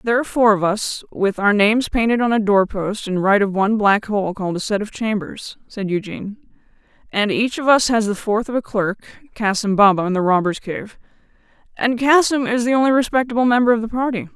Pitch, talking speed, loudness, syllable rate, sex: 215 Hz, 210 wpm, -18 LUFS, 5.9 syllables/s, female